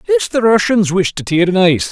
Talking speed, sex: 190 wpm, male